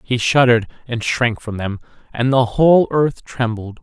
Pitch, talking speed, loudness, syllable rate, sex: 120 Hz, 170 wpm, -17 LUFS, 4.8 syllables/s, male